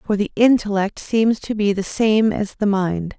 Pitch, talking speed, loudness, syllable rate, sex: 205 Hz, 205 wpm, -19 LUFS, 4.4 syllables/s, female